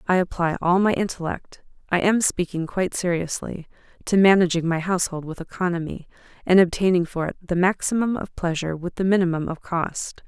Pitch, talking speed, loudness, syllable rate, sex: 180 Hz, 170 wpm, -22 LUFS, 5.0 syllables/s, female